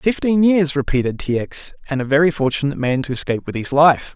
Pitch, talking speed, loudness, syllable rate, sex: 145 Hz, 215 wpm, -18 LUFS, 6.1 syllables/s, male